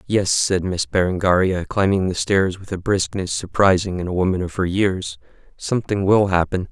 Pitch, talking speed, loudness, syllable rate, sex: 95 Hz, 180 wpm, -19 LUFS, 5.0 syllables/s, male